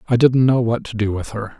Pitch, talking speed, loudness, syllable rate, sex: 115 Hz, 300 wpm, -18 LUFS, 5.9 syllables/s, male